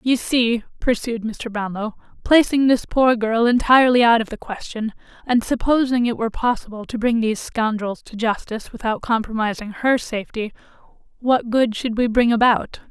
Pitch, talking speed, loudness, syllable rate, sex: 230 Hz, 165 wpm, -20 LUFS, 5.1 syllables/s, female